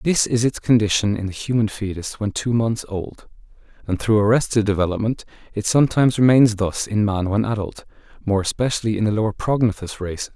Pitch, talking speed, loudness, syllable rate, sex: 110 Hz, 180 wpm, -20 LUFS, 5.8 syllables/s, male